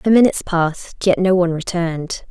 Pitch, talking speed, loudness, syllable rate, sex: 175 Hz, 180 wpm, -18 LUFS, 6.0 syllables/s, female